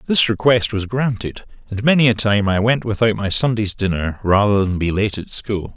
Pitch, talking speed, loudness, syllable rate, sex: 105 Hz, 210 wpm, -18 LUFS, 5.1 syllables/s, male